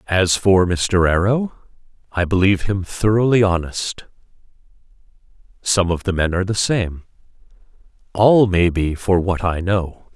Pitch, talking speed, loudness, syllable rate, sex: 95 Hz, 135 wpm, -18 LUFS, 4.4 syllables/s, male